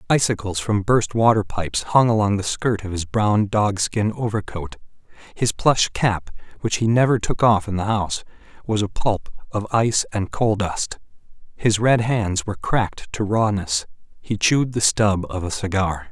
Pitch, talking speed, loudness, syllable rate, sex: 105 Hz, 180 wpm, -21 LUFS, 4.7 syllables/s, male